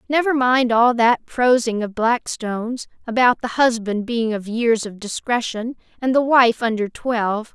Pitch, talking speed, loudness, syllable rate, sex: 235 Hz, 160 wpm, -19 LUFS, 4.3 syllables/s, female